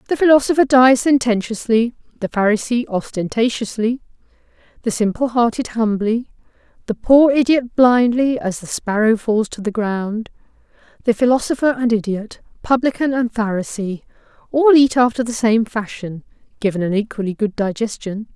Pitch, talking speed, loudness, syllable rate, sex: 230 Hz, 120 wpm, -17 LUFS, 5.0 syllables/s, female